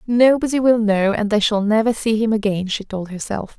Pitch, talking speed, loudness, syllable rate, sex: 215 Hz, 220 wpm, -18 LUFS, 5.2 syllables/s, female